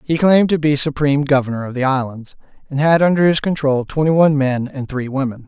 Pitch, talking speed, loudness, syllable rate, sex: 140 Hz, 220 wpm, -16 LUFS, 6.2 syllables/s, male